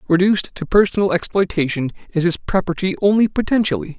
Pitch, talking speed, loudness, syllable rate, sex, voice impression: 185 Hz, 135 wpm, -18 LUFS, 6.2 syllables/s, male, very masculine, slightly middle-aged, slightly thick, very tensed, powerful, very bright, slightly soft, very clear, very fluent, slightly raspy, slightly cool, slightly intellectual, refreshing, slightly sincere, slightly calm, slightly mature, friendly, slightly reassuring, very unique, slightly elegant, wild, slightly sweet, very lively, very intense, sharp